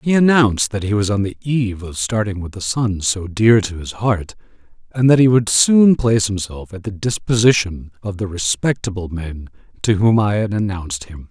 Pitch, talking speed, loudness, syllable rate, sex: 105 Hz, 200 wpm, -17 LUFS, 5.1 syllables/s, male